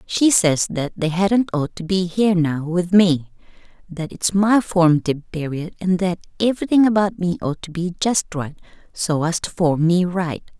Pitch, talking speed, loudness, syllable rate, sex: 175 Hz, 180 wpm, -19 LUFS, 4.6 syllables/s, female